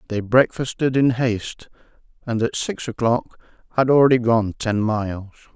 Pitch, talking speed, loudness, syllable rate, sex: 115 Hz, 140 wpm, -20 LUFS, 4.8 syllables/s, male